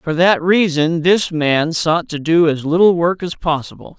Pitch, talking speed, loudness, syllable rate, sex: 165 Hz, 195 wpm, -15 LUFS, 4.3 syllables/s, male